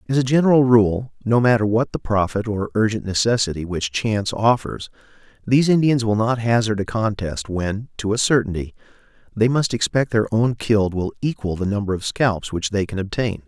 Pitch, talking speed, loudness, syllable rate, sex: 110 Hz, 185 wpm, -20 LUFS, 5.3 syllables/s, male